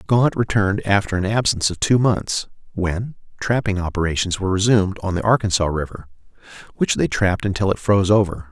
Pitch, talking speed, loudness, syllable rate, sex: 100 Hz, 170 wpm, -19 LUFS, 6.0 syllables/s, male